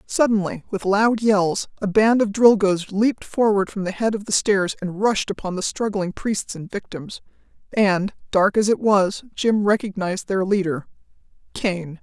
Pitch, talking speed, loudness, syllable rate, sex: 200 Hz, 165 wpm, -21 LUFS, 4.5 syllables/s, female